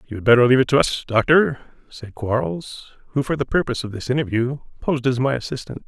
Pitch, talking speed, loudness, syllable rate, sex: 125 Hz, 215 wpm, -20 LUFS, 6.4 syllables/s, male